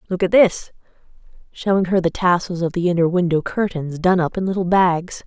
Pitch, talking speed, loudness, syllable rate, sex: 180 Hz, 195 wpm, -18 LUFS, 5.4 syllables/s, female